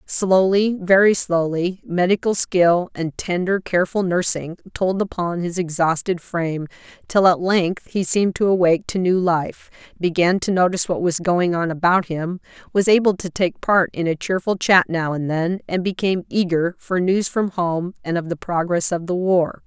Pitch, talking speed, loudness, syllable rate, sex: 180 Hz, 180 wpm, -19 LUFS, 4.8 syllables/s, female